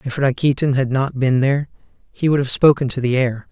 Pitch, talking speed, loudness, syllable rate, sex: 135 Hz, 220 wpm, -17 LUFS, 5.7 syllables/s, male